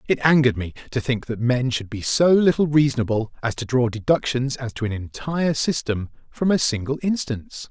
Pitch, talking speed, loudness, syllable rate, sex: 130 Hz, 195 wpm, -22 LUFS, 5.5 syllables/s, male